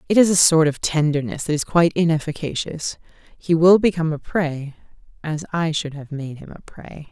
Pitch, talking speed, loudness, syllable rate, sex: 160 Hz, 195 wpm, -19 LUFS, 5.4 syllables/s, female